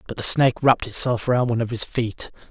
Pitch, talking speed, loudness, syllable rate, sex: 120 Hz, 240 wpm, -21 LUFS, 6.9 syllables/s, male